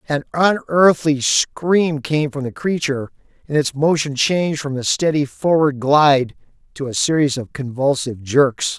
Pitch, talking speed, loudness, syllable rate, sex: 145 Hz, 150 wpm, -18 LUFS, 4.5 syllables/s, male